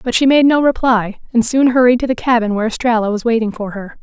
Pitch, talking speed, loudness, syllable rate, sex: 235 Hz, 255 wpm, -14 LUFS, 6.4 syllables/s, female